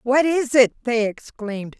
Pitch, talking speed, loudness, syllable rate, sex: 245 Hz, 165 wpm, -20 LUFS, 4.5 syllables/s, female